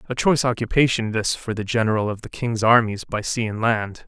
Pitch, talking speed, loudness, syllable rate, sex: 115 Hz, 220 wpm, -21 LUFS, 5.6 syllables/s, male